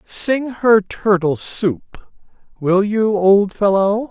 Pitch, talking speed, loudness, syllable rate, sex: 205 Hz, 115 wpm, -16 LUFS, 2.8 syllables/s, male